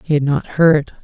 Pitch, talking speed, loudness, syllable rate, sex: 150 Hz, 235 wpm, -15 LUFS, 4.7 syllables/s, female